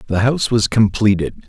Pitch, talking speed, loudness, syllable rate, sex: 110 Hz, 160 wpm, -16 LUFS, 5.4 syllables/s, male